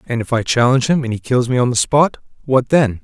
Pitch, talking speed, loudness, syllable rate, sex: 125 Hz, 275 wpm, -16 LUFS, 5.9 syllables/s, male